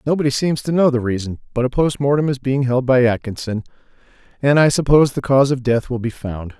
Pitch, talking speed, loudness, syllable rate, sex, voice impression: 130 Hz, 230 wpm, -18 LUFS, 6.2 syllables/s, male, very masculine, adult-like, slightly thick, cool, sincere, slightly calm